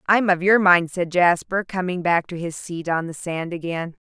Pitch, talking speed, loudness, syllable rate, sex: 175 Hz, 220 wpm, -21 LUFS, 4.7 syllables/s, female